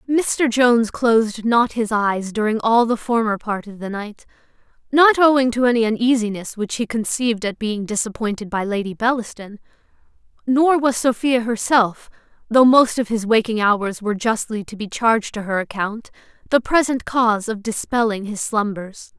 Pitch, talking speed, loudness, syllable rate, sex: 225 Hz, 165 wpm, -19 LUFS, 4.9 syllables/s, female